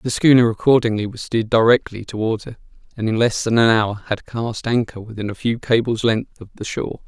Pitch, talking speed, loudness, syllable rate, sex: 115 Hz, 210 wpm, -19 LUFS, 5.7 syllables/s, male